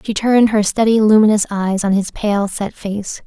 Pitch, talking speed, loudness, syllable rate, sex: 210 Hz, 200 wpm, -15 LUFS, 4.9 syllables/s, female